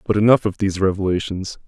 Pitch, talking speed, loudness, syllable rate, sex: 100 Hz, 180 wpm, -19 LUFS, 6.9 syllables/s, male